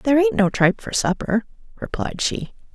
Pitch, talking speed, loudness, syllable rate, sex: 215 Hz, 175 wpm, -21 LUFS, 5.3 syllables/s, female